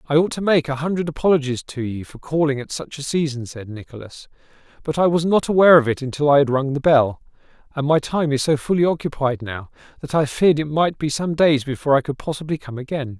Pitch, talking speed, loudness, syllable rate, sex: 145 Hz, 235 wpm, -19 LUFS, 6.2 syllables/s, male